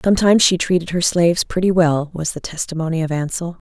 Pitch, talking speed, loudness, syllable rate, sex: 170 Hz, 195 wpm, -18 LUFS, 6.4 syllables/s, female